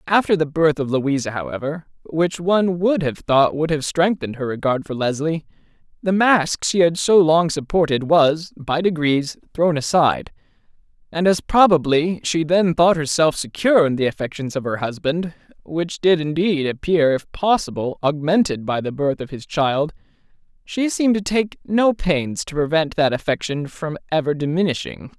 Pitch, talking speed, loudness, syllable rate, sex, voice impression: 160 Hz, 165 wpm, -19 LUFS, 4.1 syllables/s, male, very masculine, very adult-like, tensed, powerful, slightly bright, slightly hard, clear, slightly halting, slightly cool, intellectual, refreshing, sincere, slightly calm, slightly friendly, slightly reassuring, slightly unique, slightly elegant, slightly wild, slightly sweet, lively, slightly strict, slightly intense